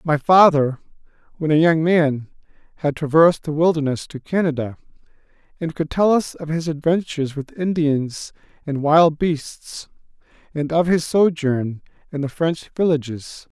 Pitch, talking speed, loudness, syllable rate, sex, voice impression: 155 Hz, 140 wpm, -19 LUFS, 4.5 syllables/s, male, very masculine, very adult-like, old, thick, slightly tensed, slightly weak, slightly bright, slightly soft, slightly clear, slightly fluent, slightly raspy, intellectual, refreshing, slightly sincere, calm, slightly mature, friendly, reassuring, very unique, elegant, slightly sweet, kind, very modest, light